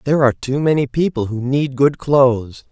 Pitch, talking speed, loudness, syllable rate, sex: 135 Hz, 200 wpm, -17 LUFS, 5.5 syllables/s, male